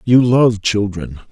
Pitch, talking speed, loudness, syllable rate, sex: 110 Hz, 135 wpm, -15 LUFS, 3.5 syllables/s, male